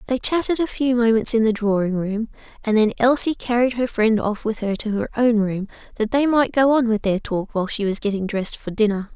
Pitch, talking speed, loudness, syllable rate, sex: 225 Hz, 245 wpm, -20 LUFS, 5.7 syllables/s, female